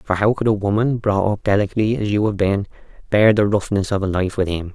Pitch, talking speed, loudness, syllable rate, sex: 100 Hz, 255 wpm, -19 LUFS, 6.1 syllables/s, male